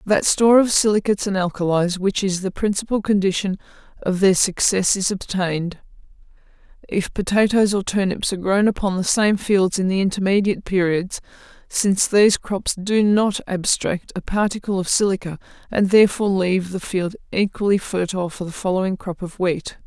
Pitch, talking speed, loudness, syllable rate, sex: 195 Hz, 160 wpm, -20 LUFS, 5.4 syllables/s, female